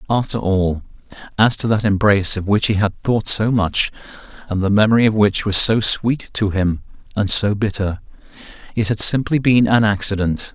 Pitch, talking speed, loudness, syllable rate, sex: 105 Hz, 175 wpm, -17 LUFS, 5.1 syllables/s, male